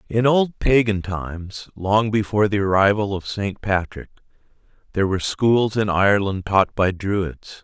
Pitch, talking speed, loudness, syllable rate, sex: 100 Hz, 150 wpm, -20 LUFS, 4.6 syllables/s, male